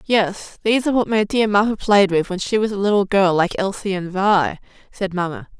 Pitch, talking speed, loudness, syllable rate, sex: 200 Hz, 225 wpm, -19 LUFS, 5.4 syllables/s, female